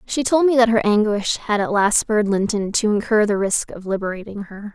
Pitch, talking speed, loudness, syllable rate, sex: 215 Hz, 230 wpm, -19 LUFS, 5.4 syllables/s, female